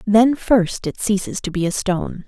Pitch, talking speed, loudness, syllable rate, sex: 200 Hz, 210 wpm, -19 LUFS, 4.7 syllables/s, female